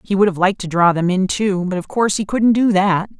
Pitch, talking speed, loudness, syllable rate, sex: 195 Hz, 300 wpm, -17 LUFS, 6.1 syllables/s, female